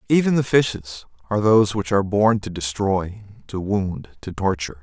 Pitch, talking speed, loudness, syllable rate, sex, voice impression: 100 Hz, 175 wpm, -20 LUFS, 5.3 syllables/s, male, very masculine, slightly young, adult-like, thick, tensed, powerful, bright, soft, very clear, fluent, slightly raspy, very cool, very intellectual, very refreshing, very sincere, very calm, mature, very friendly, very reassuring, unique, very elegant, slightly wild, very sweet, lively, kind, slightly modest